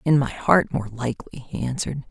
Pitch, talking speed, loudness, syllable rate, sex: 130 Hz, 200 wpm, -23 LUFS, 5.6 syllables/s, female